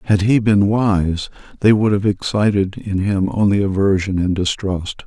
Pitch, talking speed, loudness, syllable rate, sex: 100 Hz, 165 wpm, -17 LUFS, 4.4 syllables/s, male